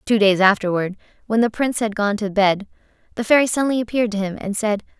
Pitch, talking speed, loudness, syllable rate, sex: 215 Hz, 215 wpm, -19 LUFS, 6.5 syllables/s, female